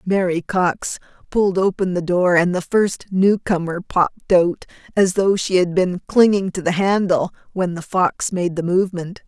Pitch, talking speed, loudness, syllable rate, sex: 185 Hz, 175 wpm, -19 LUFS, 4.5 syllables/s, female